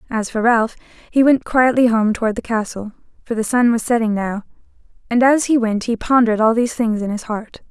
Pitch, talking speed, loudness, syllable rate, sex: 230 Hz, 220 wpm, -17 LUFS, 5.7 syllables/s, female